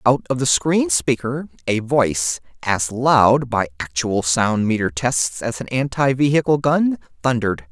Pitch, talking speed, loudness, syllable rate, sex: 120 Hz, 155 wpm, -19 LUFS, 4.2 syllables/s, male